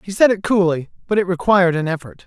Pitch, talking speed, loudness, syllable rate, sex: 185 Hz, 240 wpm, -17 LUFS, 6.5 syllables/s, male